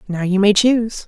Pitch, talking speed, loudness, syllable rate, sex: 205 Hz, 225 wpm, -15 LUFS, 5.5 syllables/s, female